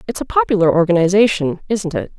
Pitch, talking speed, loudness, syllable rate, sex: 190 Hz, 165 wpm, -16 LUFS, 6.3 syllables/s, female